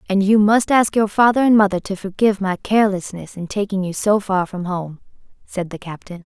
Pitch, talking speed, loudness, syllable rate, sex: 200 Hz, 210 wpm, -18 LUFS, 5.5 syllables/s, female